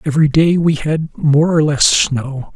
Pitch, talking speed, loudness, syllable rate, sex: 150 Hz, 190 wpm, -14 LUFS, 4.1 syllables/s, male